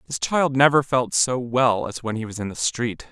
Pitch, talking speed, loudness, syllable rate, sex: 115 Hz, 250 wpm, -21 LUFS, 4.8 syllables/s, male